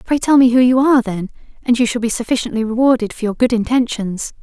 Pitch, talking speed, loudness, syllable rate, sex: 235 Hz, 230 wpm, -15 LUFS, 6.3 syllables/s, female